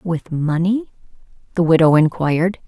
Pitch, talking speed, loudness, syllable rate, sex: 170 Hz, 110 wpm, -17 LUFS, 4.6 syllables/s, female